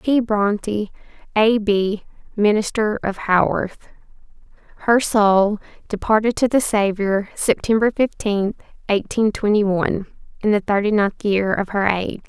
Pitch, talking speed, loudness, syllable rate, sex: 210 Hz, 125 wpm, -19 LUFS, 4.4 syllables/s, female